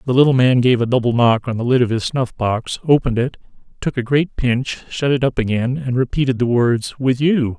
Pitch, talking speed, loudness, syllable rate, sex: 125 Hz, 235 wpm, -17 LUFS, 5.5 syllables/s, male